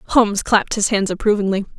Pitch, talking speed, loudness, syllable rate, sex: 205 Hz, 170 wpm, -18 LUFS, 6.1 syllables/s, female